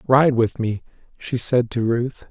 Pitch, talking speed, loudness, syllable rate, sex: 120 Hz, 180 wpm, -20 LUFS, 3.9 syllables/s, male